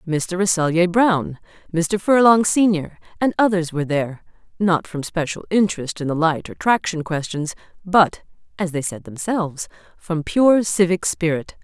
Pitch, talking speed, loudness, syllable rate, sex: 175 Hz, 150 wpm, -19 LUFS, 4.7 syllables/s, female